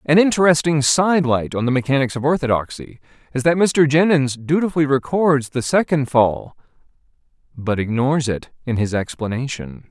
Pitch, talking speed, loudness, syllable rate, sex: 140 Hz, 140 wpm, -18 LUFS, 5.3 syllables/s, male